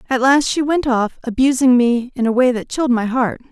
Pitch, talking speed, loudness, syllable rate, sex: 250 Hz, 240 wpm, -16 LUFS, 5.4 syllables/s, female